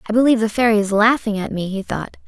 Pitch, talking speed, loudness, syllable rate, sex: 215 Hz, 265 wpm, -18 LUFS, 7.0 syllables/s, female